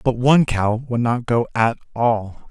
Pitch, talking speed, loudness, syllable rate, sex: 120 Hz, 190 wpm, -19 LUFS, 4.2 syllables/s, male